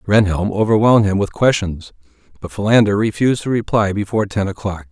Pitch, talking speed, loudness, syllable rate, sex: 100 Hz, 160 wpm, -16 LUFS, 6.1 syllables/s, male